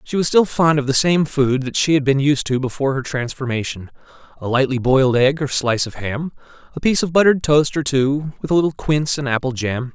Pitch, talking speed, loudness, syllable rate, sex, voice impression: 140 Hz, 235 wpm, -18 LUFS, 6.0 syllables/s, male, masculine, adult-like, tensed, bright, clear, fluent, cool, intellectual, refreshing, calm, reassuring, modest